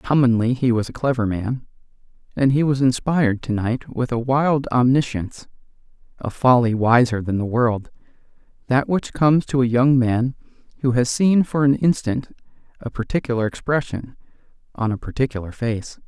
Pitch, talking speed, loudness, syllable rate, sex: 125 Hz, 155 wpm, -20 LUFS, 5.0 syllables/s, male